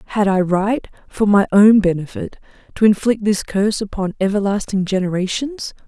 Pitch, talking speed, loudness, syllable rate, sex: 200 Hz, 145 wpm, -17 LUFS, 5.2 syllables/s, female